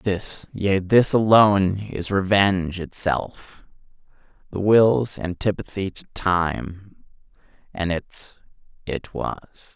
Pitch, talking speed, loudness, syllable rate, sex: 95 Hz, 100 wpm, -21 LUFS, 3.1 syllables/s, male